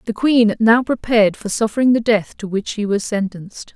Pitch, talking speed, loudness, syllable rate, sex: 215 Hz, 210 wpm, -17 LUFS, 5.3 syllables/s, female